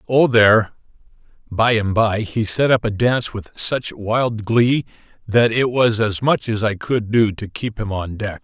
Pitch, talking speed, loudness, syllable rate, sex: 110 Hz, 200 wpm, -18 LUFS, 4.3 syllables/s, male